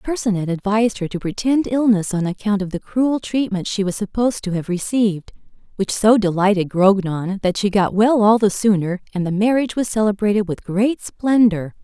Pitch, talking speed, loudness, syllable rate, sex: 205 Hz, 190 wpm, -18 LUFS, 5.3 syllables/s, female